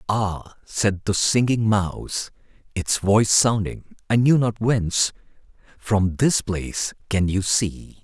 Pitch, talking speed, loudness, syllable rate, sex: 105 Hz, 135 wpm, -21 LUFS, 3.9 syllables/s, male